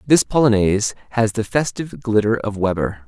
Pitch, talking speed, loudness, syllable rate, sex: 110 Hz, 155 wpm, -19 LUFS, 5.5 syllables/s, male